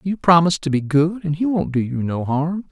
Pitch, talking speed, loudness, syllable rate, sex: 160 Hz, 265 wpm, -19 LUFS, 5.4 syllables/s, male